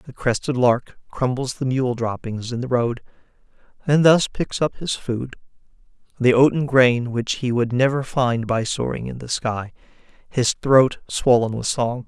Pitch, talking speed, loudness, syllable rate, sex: 125 Hz, 170 wpm, -20 LUFS, 4.2 syllables/s, male